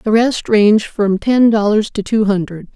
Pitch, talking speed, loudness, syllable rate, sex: 215 Hz, 195 wpm, -14 LUFS, 4.6 syllables/s, female